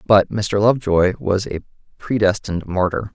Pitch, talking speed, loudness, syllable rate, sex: 100 Hz, 135 wpm, -19 LUFS, 4.9 syllables/s, male